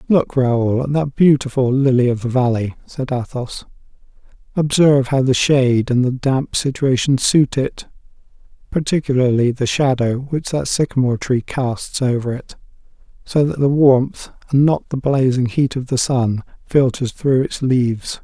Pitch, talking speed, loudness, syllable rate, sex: 130 Hz, 155 wpm, -17 LUFS, 4.5 syllables/s, male